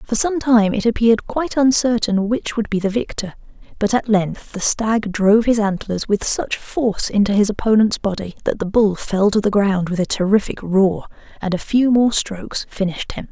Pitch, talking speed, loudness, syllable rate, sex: 215 Hz, 205 wpm, -18 LUFS, 5.1 syllables/s, female